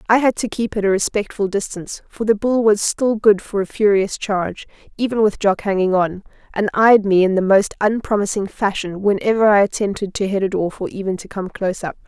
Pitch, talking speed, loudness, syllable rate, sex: 205 Hz, 220 wpm, -18 LUFS, 5.6 syllables/s, female